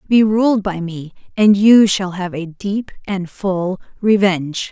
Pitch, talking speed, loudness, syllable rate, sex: 195 Hz, 165 wpm, -16 LUFS, 3.8 syllables/s, female